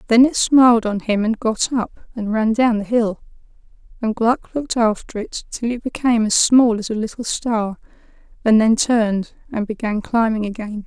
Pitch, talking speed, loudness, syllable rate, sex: 225 Hz, 190 wpm, -18 LUFS, 4.9 syllables/s, female